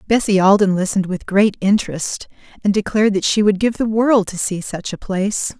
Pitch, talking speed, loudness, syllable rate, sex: 200 Hz, 205 wpm, -17 LUFS, 5.6 syllables/s, female